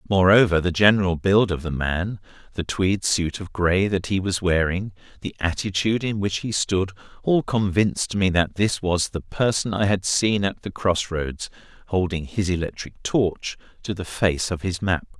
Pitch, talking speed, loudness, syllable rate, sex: 95 Hz, 185 wpm, -22 LUFS, 4.6 syllables/s, male